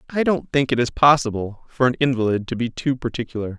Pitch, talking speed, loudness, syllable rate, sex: 125 Hz, 215 wpm, -20 LUFS, 6.0 syllables/s, male